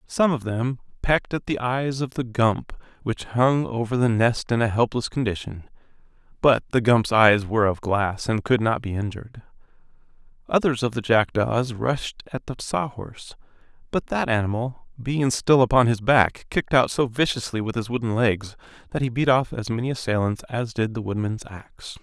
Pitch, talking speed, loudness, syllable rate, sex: 115 Hz, 185 wpm, -23 LUFS, 5.0 syllables/s, male